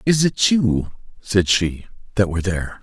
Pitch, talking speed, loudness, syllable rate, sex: 100 Hz, 170 wpm, -19 LUFS, 4.8 syllables/s, male